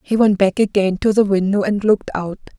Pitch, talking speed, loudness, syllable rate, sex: 200 Hz, 230 wpm, -17 LUFS, 5.7 syllables/s, female